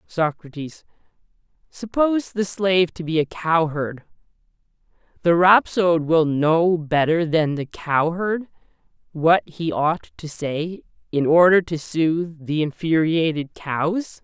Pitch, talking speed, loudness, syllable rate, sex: 165 Hz, 120 wpm, -20 LUFS, 3.9 syllables/s, male